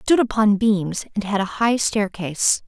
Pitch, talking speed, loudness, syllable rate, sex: 210 Hz, 200 wpm, -20 LUFS, 5.2 syllables/s, female